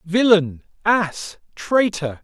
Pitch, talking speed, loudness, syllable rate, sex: 185 Hz, 80 wpm, -18 LUFS, 2.8 syllables/s, male